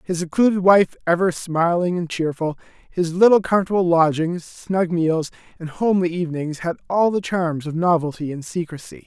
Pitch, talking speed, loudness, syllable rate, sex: 170 Hz, 160 wpm, -20 LUFS, 5.2 syllables/s, male